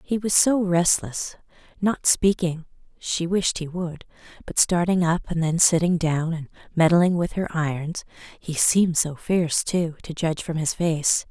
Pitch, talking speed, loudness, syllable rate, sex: 170 Hz, 170 wpm, -22 LUFS, 4.3 syllables/s, female